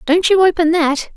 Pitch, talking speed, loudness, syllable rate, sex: 335 Hz, 205 wpm, -14 LUFS, 5.0 syllables/s, female